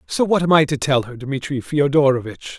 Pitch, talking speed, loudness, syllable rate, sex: 140 Hz, 210 wpm, -18 LUFS, 5.3 syllables/s, male